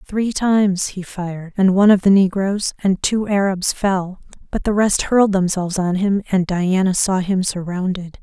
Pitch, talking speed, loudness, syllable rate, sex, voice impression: 190 Hz, 180 wpm, -18 LUFS, 4.8 syllables/s, female, feminine, adult-like, slightly soft, calm, slightly kind